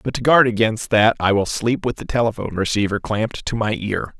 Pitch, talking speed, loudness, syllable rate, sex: 110 Hz, 230 wpm, -19 LUFS, 5.8 syllables/s, male